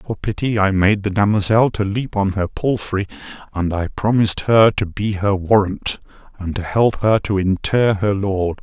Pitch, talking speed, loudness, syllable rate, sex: 100 Hz, 195 wpm, -18 LUFS, 4.7 syllables/s, male